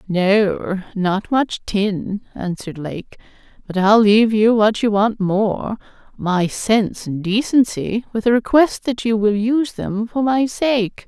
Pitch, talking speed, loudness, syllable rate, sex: 215 Hz, 155 wpm, -18 LUFS, 3.8 syllables/s, female